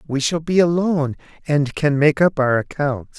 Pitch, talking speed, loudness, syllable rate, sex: 150 Hz, 190 wpm, -19 LUFS, 4.7 syllables/s, male